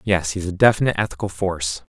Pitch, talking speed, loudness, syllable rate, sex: 95 Hz, 185 wpm, -20 LUFS, 6.9 syllables/s, male